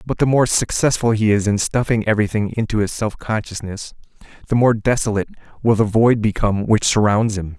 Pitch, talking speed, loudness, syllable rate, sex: 110 Hz, 180 wpm, -18 LUFS, 5.8 syllables/s, male